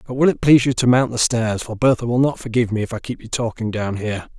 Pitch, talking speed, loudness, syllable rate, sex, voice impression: 120 Hz, 300 wpm, -19 LUFS, 6.7 syllables/s, male, masculine, adult-like, slightly thick, sincere, calm, slightly kind